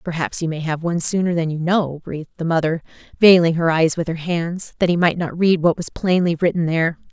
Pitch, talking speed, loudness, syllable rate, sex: 165 Hz, 235 wpm, -19 LUFS, 5.8 syllables/s, female